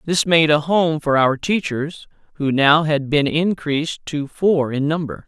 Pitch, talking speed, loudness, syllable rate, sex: 155 Hz, 180 wpm, -18 LUFS, 4.2 syllables/s, male